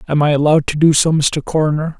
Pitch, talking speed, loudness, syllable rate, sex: 150 Hz, 240 wpm, -14 LUFS, 6.8 syllables/s, male